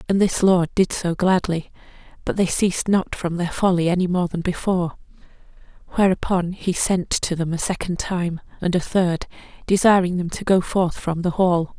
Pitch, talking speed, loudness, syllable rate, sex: 180 Hz, 185 wpm, -21 LUFS, 4.9 syllables/s, female